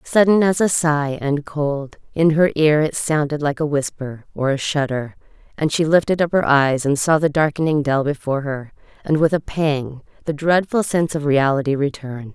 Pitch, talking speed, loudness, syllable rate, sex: 150 Hz, 195 wpm, -19 LUFS, 5.0 syllables/s, female